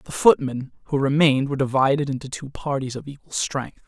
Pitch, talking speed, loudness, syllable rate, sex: 140 Hz, 185 wpm, -22 LUFS, 5.8 syllables/s, male